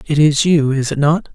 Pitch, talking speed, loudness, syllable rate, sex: 150 Hz, 225 wpm, -14 LUFS, 4.9 syllables/s, male